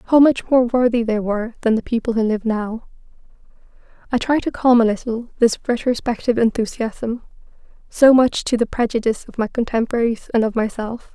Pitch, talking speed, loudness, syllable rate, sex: 230 Hz, 170 wpm, -19 LUFS, 5.6 syllables/s, female